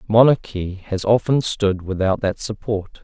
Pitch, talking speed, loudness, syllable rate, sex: 105 Hz, 140 wpm, -20 LUFS, 4.2 syllables/s, male